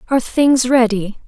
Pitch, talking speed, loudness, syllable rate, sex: 240 Hz, 140 wpm, -15 LUFS, 4.9 syllables/s, female